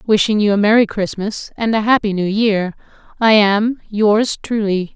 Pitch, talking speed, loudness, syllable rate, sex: 210 Hz, 170 wpm, -16 LUFS, 4.5 syllables/s, female